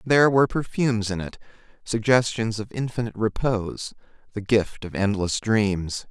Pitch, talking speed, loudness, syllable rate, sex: 110 Hz, 140 wpm, -23 LUFS, 5.1 syllables/s, male